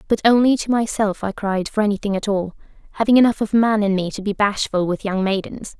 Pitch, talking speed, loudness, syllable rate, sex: 205 Hz, 230 wpm, -19 LUFS, 5.8 syllables/s, female